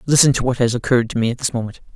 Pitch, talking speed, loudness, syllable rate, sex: 120 Hz, 305 wpm, -18 LUFS, 8.2 syllables/s, male